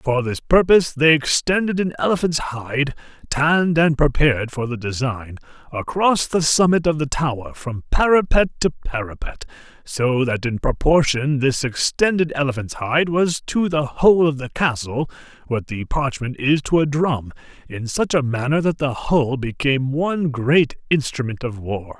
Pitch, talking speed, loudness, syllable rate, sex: 140 Hz, 160 wpm, -19 LUFS, 4.7 syllables/s, male